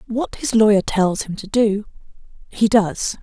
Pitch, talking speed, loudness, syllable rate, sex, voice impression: 210 Hz, 170 wpm, -18 LUFS, 4.2 syllables/s, female, feminine, adult-like, weak, muffled, halting, raspy, intellectual, calm, slightly reassuring, unique, elegant, modest